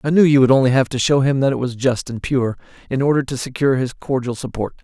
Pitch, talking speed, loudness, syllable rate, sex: 130 Hz, 275 wpm, -18 LUFS, 6.5 syllables/s, male